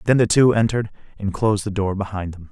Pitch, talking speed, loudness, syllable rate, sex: 105 Hz, 240 wpm, -20 LUFS, 6.6 syllables/s, male